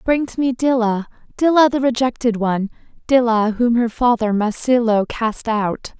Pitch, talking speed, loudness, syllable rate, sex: 235 Hz, 150 wpm, -18 LUFS, 4.7 syllables/s, female